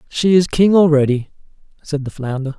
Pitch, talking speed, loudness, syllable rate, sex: 150 Hz, 160 wpm, -16 LUFS, 5.4 syllables/s, male